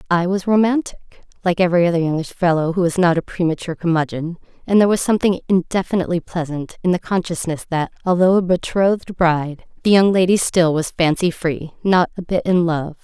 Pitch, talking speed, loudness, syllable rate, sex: 175 Hz, 185 wpm, -18 LUFS, 6.0 syllables/s, female